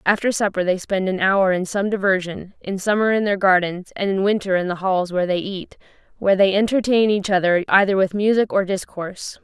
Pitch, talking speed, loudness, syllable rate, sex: 195 Hz, 210 wpm, -19 LUFS, 5.6 syllables/s, female